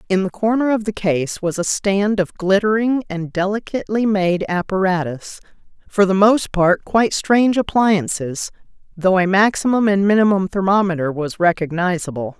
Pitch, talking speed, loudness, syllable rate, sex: 195 Hz, 145 wpm, -18 LUFS, 4.9 syllables/s, female